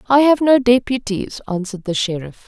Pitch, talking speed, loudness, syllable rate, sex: 225 Hz, 170 wpm, -17 LUFS, 5.4 syllables/s, female